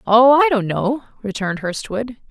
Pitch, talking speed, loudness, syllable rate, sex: 230 Hz, 155 wpm, -18 LUFS, 4.8 syllables/s, female